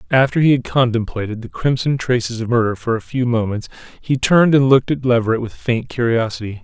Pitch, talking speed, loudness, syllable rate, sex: 120 Hz, 200 wpm, -17 LUFS, 6.1 syllables/s, male